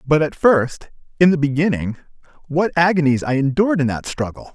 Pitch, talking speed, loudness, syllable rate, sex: 150 Hz, 170 wpm, -18 LUFS, 5.6 syllables/s, male